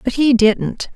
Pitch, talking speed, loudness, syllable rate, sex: 235 Hz, 190 wpm, -15 LUFS, 3.5 syllables/s, female